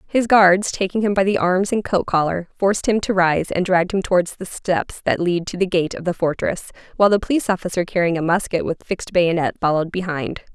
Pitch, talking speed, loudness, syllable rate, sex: 185 Hz, 230 wpm, -19 LUFS, 5.9 syllables/s, female